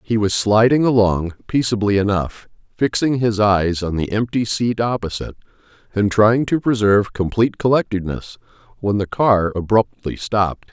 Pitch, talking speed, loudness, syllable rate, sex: 105 Hz, 140 wpm, -18 LUFS, 4.9 syllables/s, male